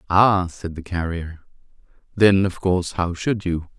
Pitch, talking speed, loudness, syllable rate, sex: 90 Hz, 160 wpm, -21 LUFS, 4.2 syllables/s, male